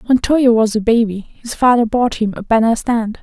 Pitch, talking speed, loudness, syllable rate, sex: 230 Hz, 225 wpm, -15 LUFS, 5.2 syllables/s, female